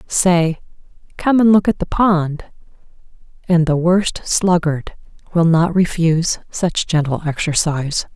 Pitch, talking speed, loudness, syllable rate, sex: 170 Hz, 125 wpm, -16 LUFS, 4.0 syllables/s, female